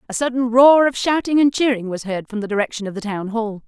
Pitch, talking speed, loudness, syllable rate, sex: 230 Hz, 260 wpm, -18 LUFS, 6.0 syllables/s, female